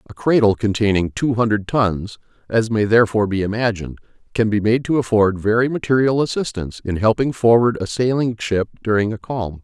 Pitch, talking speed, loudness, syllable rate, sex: 110 Hz, 175 wpm, -18 LUFS, 5.7 syllables/s, male